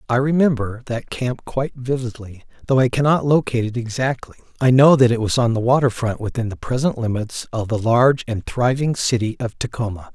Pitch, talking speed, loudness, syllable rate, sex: 120 Hz, 195 wpm, -19 LUFS, 5.6 syllables/s, male